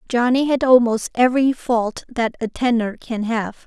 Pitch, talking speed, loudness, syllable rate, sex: 240 Hz, 165 wpm, -19 LUFS, 4.4 syllables/s, female